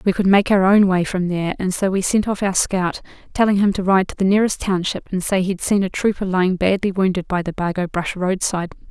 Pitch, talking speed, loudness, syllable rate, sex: 190 Hz, 250 wpm, -19 LUFS, 5.9 syllables/s, female